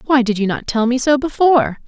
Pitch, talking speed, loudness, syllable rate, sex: 250 Hz, 255 wpm, -16 LUFS, 5.8 syllables/s, female